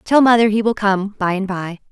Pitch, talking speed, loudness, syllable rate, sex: 205 Hz, 250 wpm, -16 LUFS, 5.2 syllables/s, female